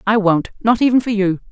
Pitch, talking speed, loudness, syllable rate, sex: 210 Hz, 235 wpm, -16 LUFS, 5.7 syllables/s, female